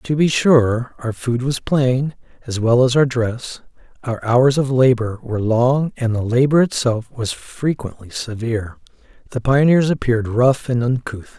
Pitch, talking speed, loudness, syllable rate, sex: 125 Hz, 165 wpm, -18 LUFS, 4.3 syllables/s, male